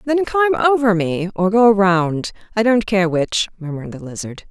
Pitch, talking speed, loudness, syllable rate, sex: 205 Hz, 160 wpm, -17 LUFS, 4.9 syllables/s, female